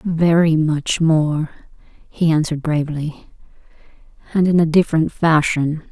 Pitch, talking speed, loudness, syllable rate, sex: 160 Hz, 110 wpm, -17 LUFS, 4.4 syllables/s, female